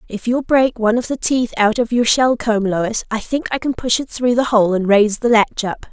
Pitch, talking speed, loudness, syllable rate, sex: 230 Hz, 275 wpm, -16 LUFS, 5.2 syllables/s, female